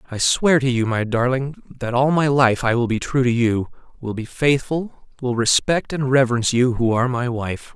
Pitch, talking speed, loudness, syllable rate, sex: 125 Hz, 215 wpm, -19 LUFS, 5.0 syllables/s, male